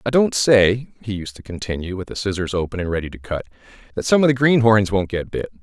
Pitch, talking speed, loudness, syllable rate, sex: 105 Hz, 245 wpm, -19 LUFS, 6.1 syllables/s, male